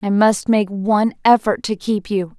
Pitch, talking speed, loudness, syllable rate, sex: 205 Hz, 200 wpm, -17 LUFS, 4.6 syllables/s, female